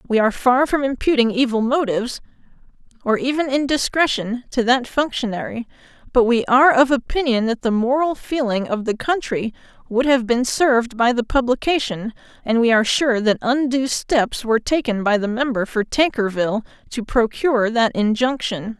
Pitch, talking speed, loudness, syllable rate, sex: 245 Hz, 160 wpm, -19 LUFS, 5.2 syllables/s, female